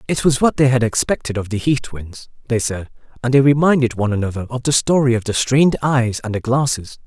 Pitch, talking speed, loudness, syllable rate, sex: 125 Hz, 230 wpm, -17 LUFS, 5.9 syllables/s, male